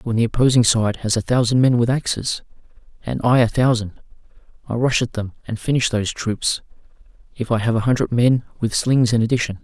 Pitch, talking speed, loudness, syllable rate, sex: 115 Hz, 200 wpm, -19 LUFS, 5.8 syllables/s, male